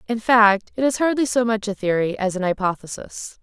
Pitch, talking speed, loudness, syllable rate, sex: 215 Hz, 195 wpm, -20 LUFS, 5.1 syllables/s, female